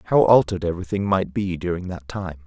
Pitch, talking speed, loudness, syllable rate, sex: 90 Hz, 220 wpm, -22 LUFS, 6.2 syllables/s, male